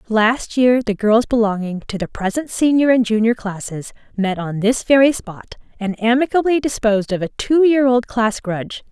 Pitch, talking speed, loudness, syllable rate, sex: 230 Hz, 180 wpm, -17 LUFS, 5.0 syllables/s, female